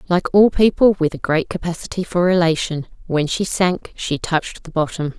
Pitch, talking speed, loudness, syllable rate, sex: 170 Hz, 185 wpm, -18 LUFS, 5.0 syllables/s, female